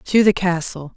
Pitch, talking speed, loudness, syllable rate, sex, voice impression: 180 Hz, 190 wpm, -18 LUFS, 4.4 syllables/s, female, feminine, adult-like, slightly dark, clear, fluent, friendly, unique, lively, kind